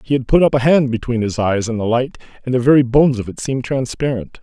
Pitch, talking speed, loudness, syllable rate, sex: 125 Hz, 270 wpm, -16 LUFS, 6.4 syllables/s, male